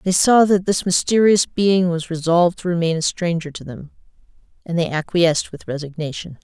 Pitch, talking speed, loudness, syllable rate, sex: 170 Hz, 175 wpm, -18 LUFS, 5.4 syllables/s, female